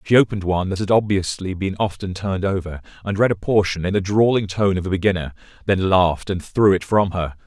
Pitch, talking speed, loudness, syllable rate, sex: 95 Hz, 225 wpm, -20 LUFS, 6.1 syllables/s, male